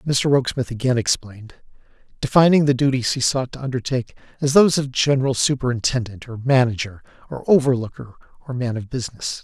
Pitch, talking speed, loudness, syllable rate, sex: 125 Hz, 155 wpm, -20 LUFS, 6.2 syllables/s, male